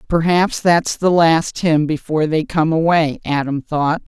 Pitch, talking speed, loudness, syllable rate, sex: 160 Hz, 160 wpm, -16 LUFS, 4.2 syllables/s, female